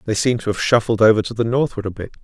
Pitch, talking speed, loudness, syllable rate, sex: 110 Hz, 295 wpm, -18 LUFS, 7.0 syllables/s, male